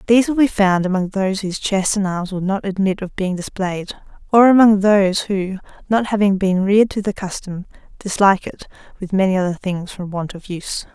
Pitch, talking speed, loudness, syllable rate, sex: 195 Hz, 205 wpm, -18 LUFS, 5.7 syllables/s, female